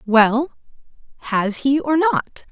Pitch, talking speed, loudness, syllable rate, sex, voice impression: 265 Hz, 120 wpm, -18 LUFS, 3.1 syllables/s, female, feminine, adult-like, slightly clear, slightly refreshing, sincere